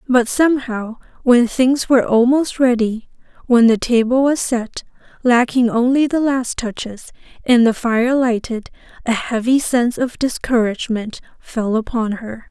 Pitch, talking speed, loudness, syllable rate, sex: 240 Hz, 140 wpm, -17 LUFS, 4.5 syllables/s, female